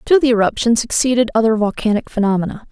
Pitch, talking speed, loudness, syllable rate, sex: 230 Hz, 155 wpm, -16 LUFS, 6.6 syllables/s, female